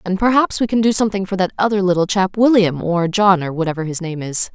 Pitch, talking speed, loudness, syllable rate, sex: 190 Hz, 250 wpm, -17 LUFS, 6.2 syllables/s, female